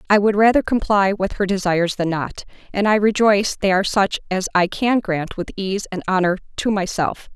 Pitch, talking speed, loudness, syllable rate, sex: 195 Hz, 205 wpm, -19 LUFS, 5.6 syllables/s, female